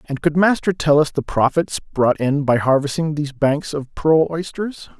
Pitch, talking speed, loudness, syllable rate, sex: 150 Hz, 190 wpm, -18 LUFS, 4.6 syllables/s, male